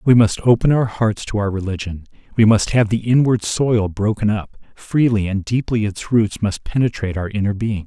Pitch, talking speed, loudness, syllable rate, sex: 110 Hz, 200 wpm, -18 LUFS, 5.1 syllables/s, male